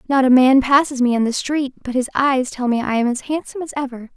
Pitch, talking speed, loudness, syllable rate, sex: 260 Hz, 275 wpm, -18 LUFS, 6.1 syllables/s, female